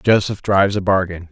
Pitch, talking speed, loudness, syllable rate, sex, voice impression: 100 Hz, 180 wpm, -17 LUFS, 5.5 syllables/s, male, very masculine, very adult-like, slightly thick, slightly fluent, slightly sincere, slightly friendly